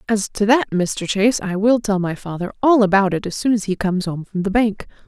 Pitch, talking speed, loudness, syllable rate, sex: 205 Hz, 260 wpm, -18 LUFS, 5.7 syllables/s, female